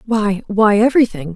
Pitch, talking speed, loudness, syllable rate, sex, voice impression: 210 Hz, 130 wpm, -15 LUFS, 5.2 syllables/s, female, feminine, adult-like, relaxed, weak, slightly dark, muffled, calm, slightly reassuring, unique, modest